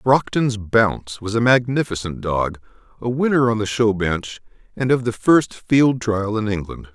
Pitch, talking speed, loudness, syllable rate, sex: 110 Hz, 175 wpm, -19 LUFS, 4.4 syllables/s, male